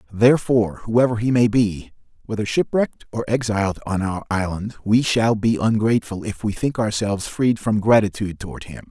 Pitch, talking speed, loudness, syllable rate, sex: 110 Hz, 170 wpm, -20 LUFS, 5.5 syllables/s, male